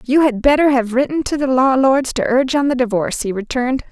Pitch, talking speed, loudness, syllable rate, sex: 260 Hz, 245 wpm, -16 LUFS, 6.1 syllables/s, female